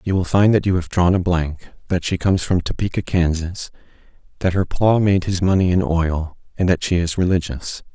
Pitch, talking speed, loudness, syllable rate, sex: 90 Hz, 210 wpm, -19 LUFS, 5.2 syllables/s, male